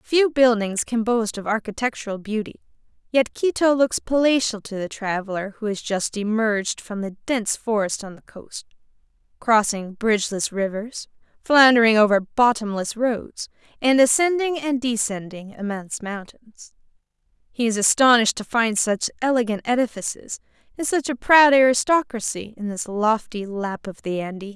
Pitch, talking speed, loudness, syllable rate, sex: 225 Hz, 140 wpm, -21 LUFS, 4.9 syllables/s, female